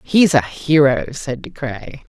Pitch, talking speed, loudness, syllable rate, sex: 145 Hz, 165 wpm, -17 LUFS, 3.7 syllables/s, female